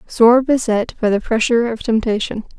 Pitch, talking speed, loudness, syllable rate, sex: 230 Hz, 165 wpm, -16 LUFS, 5.2 syllables/s, female